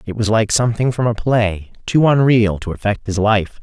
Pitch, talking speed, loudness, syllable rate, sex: 110 Hz, 215 wpm, -16 LUFS, 5.0 syllables/s, male